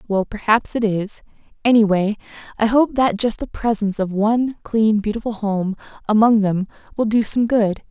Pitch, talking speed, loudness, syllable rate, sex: 215 Hz, 165 wpm, -19 LUFS, 5.0 syllables/s, female